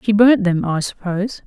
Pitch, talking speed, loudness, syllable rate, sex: 200 Hz, 205 wpm, -17 LUFS, 5.2 syllables/s, female